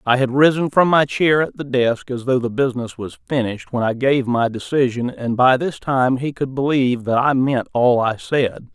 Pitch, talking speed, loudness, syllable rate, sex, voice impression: 130 Hz, 225 wpm, -18 LUFS, 5.0 syllables/s, male, very masculine, very adult-like, very middle-aged, very thick, tensed, powerful, dark, slightly soft, slightly muffled, slightly fluent, cool, intellectual, sincere, very calm, mature, friendly, reassuring, slightly unique, elegant, wild, slightly sweet, slightly lively, kind, slightly modest